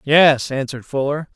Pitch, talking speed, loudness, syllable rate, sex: 140 Hz, 135 wpm, -18 LUFS, 5.0 syllables/s, male